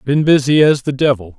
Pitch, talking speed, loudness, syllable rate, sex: 135 Hz, 215 wpm, -13 LUFS, 5.5 syllables/s, male